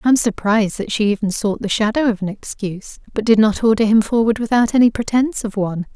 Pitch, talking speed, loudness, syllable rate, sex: 220 Hz, 230 wpm, -17 LUFS, 6.3 syllables/s, female